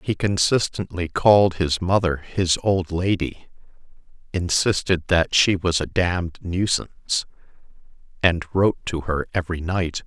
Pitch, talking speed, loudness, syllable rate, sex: 90 Hz, 120 wpm, -21 LUFS, 4.4 syllables/s, male